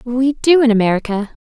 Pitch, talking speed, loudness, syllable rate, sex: 245 Hz, 165 wpm, -14 LUFS, 5.5 syllables/s, female